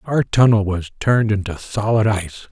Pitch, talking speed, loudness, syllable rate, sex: 105 Hz, 165 wpm, -18 LUFS, 5.2 syllables/s, male